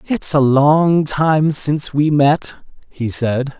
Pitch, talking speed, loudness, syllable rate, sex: 145 Hz, 150 wpm, -15 LUFS, 3.2 syllables/s, male